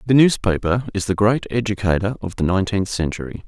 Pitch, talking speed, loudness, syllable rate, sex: 100 Hz, 175 wpm, -20 LUFS, 6.1 syllables/s, male